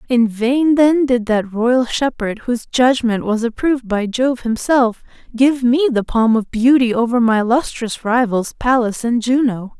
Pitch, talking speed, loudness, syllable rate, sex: 240 Hz, 165 wpm, -16 LUFS, 4.4 syllables/s, female